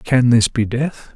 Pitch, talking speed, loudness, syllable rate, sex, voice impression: 120 Hz, 205 wpm, -17 LUFS, 3.6 syllables/s, male, very masculine, old, very thick, tensed, very powerful, bright, soft, muffled, slightly fluent, slightly raspy, very cool, intellectual, slightly refreshing, sincere, very calm, very mature, very friendly, very reassuring, very unique, elegant, very wild, sweet, lively, very kind, slightly modest